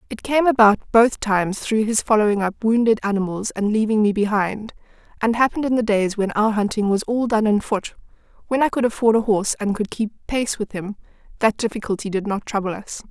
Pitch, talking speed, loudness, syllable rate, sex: 215 Hz, 210 wpm, -20 LUFS, 5.6 syllables/s, female